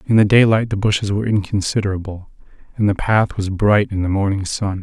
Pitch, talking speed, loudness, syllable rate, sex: 100 Hz, 200 wpm, -17 LUFS, 5.9 syllables/s, male